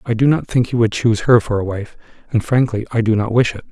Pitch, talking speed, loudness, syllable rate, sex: 115 Hz, 290 wpm, -17 LUFS, 6.3 syllables/s, male